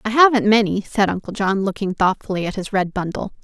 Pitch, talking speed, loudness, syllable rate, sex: 200 Hz, 210 wpm, -19 LUFS, 5.8 syllables/s, female